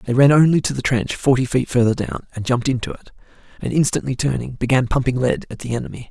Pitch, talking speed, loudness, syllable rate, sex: 130 Hz, 225 wpm, -19 LUFS, 6.4 syllables/s, male